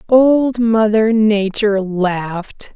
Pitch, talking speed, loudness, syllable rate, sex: 215 Hz, 85 wpm, -14 LUFS, 3.1 syllables/s, female